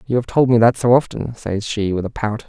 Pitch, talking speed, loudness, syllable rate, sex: 115 Hz, 290 wpm, -18 LUFS, 5.6 syllables/s, male